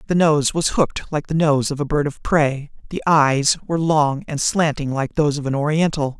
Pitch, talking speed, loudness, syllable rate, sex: 150 Hz, 225 wpm, -19 LUFS, 5.2 syllables/s, male